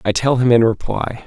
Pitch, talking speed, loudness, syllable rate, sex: 120 Hz, 235 wpm, -16 LUFS, 5.1 syllables/s, male